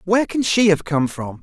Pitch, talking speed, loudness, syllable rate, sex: 180 Hz, 250 wpm, -18 LUFS, 5.3 syllables/s, male